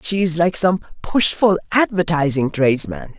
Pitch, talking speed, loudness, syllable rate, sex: 165 Hz, 130 wpm, -17 LUFS, 4.9 syllables/s, male